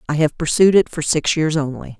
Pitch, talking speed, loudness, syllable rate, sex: 155 Hz, 240 wpm, -17 LUFS, 5.5 syllables/s, female